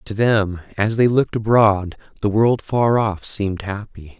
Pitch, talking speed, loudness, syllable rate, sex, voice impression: 105 Hz, 170 wpm, -18 LUFS, 4.3 syllables/s, male, masculine, adult-like, relaxed, weak, dark, slightly soft, muffled, intellectual, sincere, calm, reassuring, kind, modest